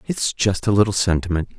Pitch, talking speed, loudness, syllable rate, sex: 100 Hz, 190 wpm, -20 LUFS, 5.7 syllables/s, male